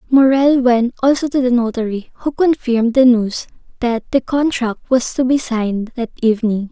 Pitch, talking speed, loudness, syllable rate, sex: 245 Hz, 170 wpm, -16 LUFS, 5.0 syllables/s, female